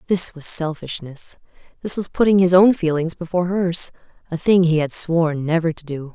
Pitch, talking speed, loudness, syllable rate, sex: 170 Hz, 175 wpm, -18 LUFS, 5.1 syllables/s, female